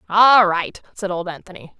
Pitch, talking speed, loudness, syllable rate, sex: 190 Hz, 165 wpm, -16 LUFS, 4.8 syllables/s, female